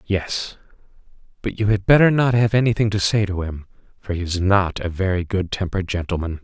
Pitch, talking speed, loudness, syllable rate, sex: 95 Hz, 195 wpm, -20 LUFS, 5.6 syllables/s, male